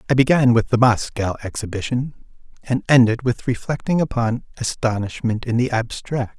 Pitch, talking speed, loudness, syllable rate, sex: 120 Hz, 140 wpm, -20 LUFS, 5.1 syllables/s, male